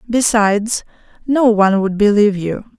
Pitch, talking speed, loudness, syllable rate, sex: 215 Hz, 130 wpm, -15 LUFS, 5.2 syllables/s, female